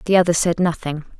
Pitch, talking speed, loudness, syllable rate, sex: 170 Hz, 200 wpm, -19 LUFS, 6.5 syllables/s, female